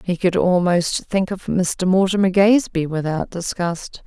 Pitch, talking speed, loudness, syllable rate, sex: 180 Hz, 150 wpm, -19 LUFS, 4.3 syllables/s, female